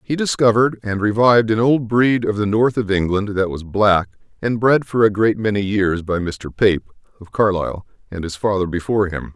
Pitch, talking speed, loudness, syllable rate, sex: 105 Hz, 205 wpm, -18 LUFS, 5.3 syllables/s, male